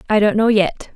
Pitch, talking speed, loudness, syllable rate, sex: 210 Hz, 255 wpm, -16 LUFS, 5.2 syllables/s, female